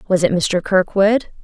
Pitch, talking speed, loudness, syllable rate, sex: 190 Hz, 165 wpm, -16 LUFS, 4.3 syllables/s, female